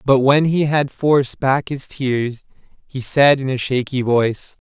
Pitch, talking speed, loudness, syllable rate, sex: 135 Hz, 180 wpm, -17 LUFS, 4.2 syllables/s, male